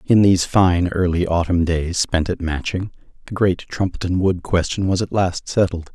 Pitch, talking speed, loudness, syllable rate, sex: 90 Hz, 180 wpm, -19 LUFS, 4.8 syllables/s, male